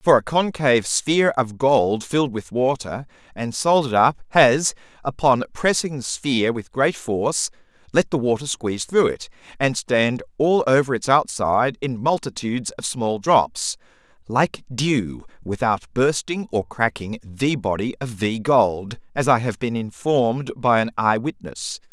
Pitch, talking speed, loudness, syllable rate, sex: 125 Hz, 155 wpm, -21 LUFS, 4.3 syllables/s, male